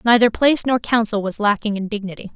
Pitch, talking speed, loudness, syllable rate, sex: 220 Hz, 205 wpm, -18 LUFS, 6.2 syllables/s, female